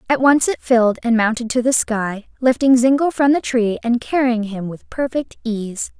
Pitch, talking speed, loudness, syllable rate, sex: 240 Hz, 200 wpm, -18 LUFS, 4.7 syllables/s, female